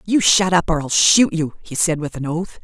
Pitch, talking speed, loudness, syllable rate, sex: 170 Hz, 275 wpm, -17 LUFS, 5.0 syllables/s, female